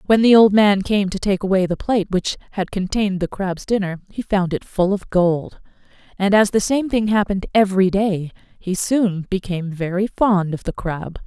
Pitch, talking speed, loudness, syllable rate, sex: 195 Hz, 200 wpm, -19 LUFS, 5.1 syllables/s, female